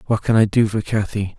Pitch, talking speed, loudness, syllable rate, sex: 105 Hz, 260 wpm, -18 LUFS, 5.7 syllables/s, male